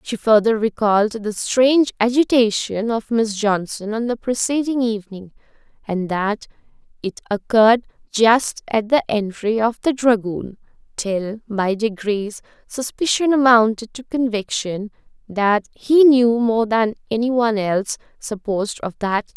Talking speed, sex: 135 wpm, female